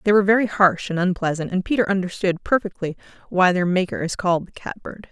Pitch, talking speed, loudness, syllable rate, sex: 190 Hz, 200 wpm, -21 LUFS, 6.2 syllables/s, female